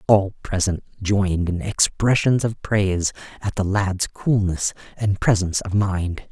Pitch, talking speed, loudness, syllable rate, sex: 100 Hz, 145 wpm, -21 LUFS, 4.3 syllables/s, male